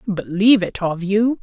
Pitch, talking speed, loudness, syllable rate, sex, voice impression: 200 Hz, 170 wpm, -18 LUFS, 4.7 syllables/s, female, feminine, adult-like, slightly powerful, intellectual, strict